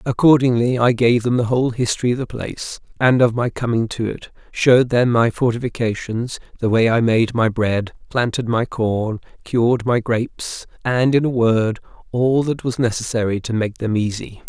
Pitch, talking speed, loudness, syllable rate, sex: 120 Hz, 180 wpm, -19 LUFS, 5.0 syllables/s, male